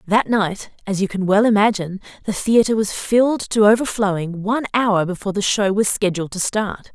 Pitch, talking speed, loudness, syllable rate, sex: 205 Hz, 190 wpm, -18 LUFS, 5.5 syllables/s, female